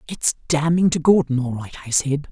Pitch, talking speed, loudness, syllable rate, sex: 150 Hz, 205 wpm, -19 LUFS, 5.2 syllables/s, female